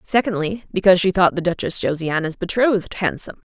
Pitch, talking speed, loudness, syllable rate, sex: 185 Hz, 155 wpm, -19 LUFS, 6.0 syllables/s, female